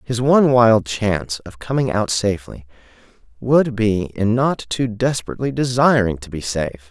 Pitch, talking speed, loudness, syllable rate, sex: 110 Hz, 155 wpm, -18 LUFS, 5.1 syllables/s, male